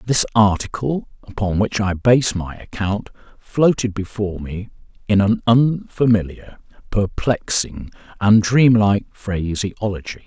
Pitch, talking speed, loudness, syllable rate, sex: 105 Hz, 110 wpm, -19 LUFS, 4.0 syllables/s, male